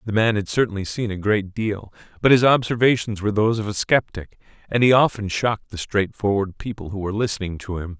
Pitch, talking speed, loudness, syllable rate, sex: 105 Hz, 210 wpm, -21 LUFS, 6.1 syllables/s, male